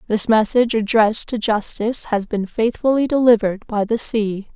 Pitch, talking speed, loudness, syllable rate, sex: 220 Hz, 160 wpm, -18 LUFS, 5.3 syllables/s, female